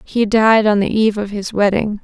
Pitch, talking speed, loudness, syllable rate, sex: 210 Hz, 235 wpm, -15 LUFS, 5.2 syllables/s, female